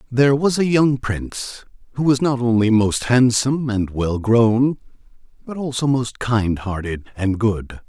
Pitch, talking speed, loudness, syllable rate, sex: 120 Hz, 160 wpm, -19 LUFS, 4.3 syllables/s, male